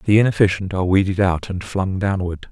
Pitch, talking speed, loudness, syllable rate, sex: 95 Hz, 190 wpm, -19 LUFS, 5.9 syllables/s, male